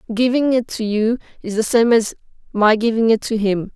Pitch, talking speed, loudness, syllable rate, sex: 225 Hz, 210 wpm, -17 LUFS, 5.3 syllables/s, female